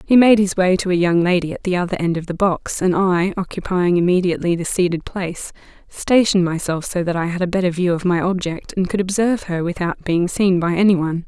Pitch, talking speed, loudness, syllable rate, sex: 180 Hz, 235 wpm, -18 LUFS, 6.0 syllables/s, female